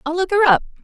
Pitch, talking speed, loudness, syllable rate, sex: 350 Hz, 285 wpm, -16 LUFS, 7.3 syllables/s, female